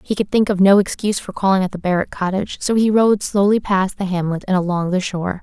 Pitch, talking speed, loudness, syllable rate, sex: 195 Hz, 255 wpm, -18 LUFS, 6.2 syllables/s, female